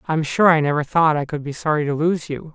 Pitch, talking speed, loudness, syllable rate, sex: 155 Hz, 305 wpm, -19 LUFS, 6.3 syllables/s, male